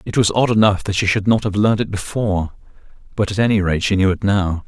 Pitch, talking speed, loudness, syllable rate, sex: 100 Hz, 255 wpm, -17 LUFS, 6.4 syllables/s, male